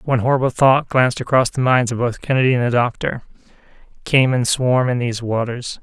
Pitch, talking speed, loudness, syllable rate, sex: 125 Hz, 185 wpm, -17 LUFS, 5.9 syllables/s, male